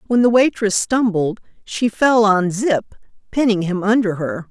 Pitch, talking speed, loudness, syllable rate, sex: 210 Hz, 160 wpm, -17 LUFS, 4.4 syllables/s, female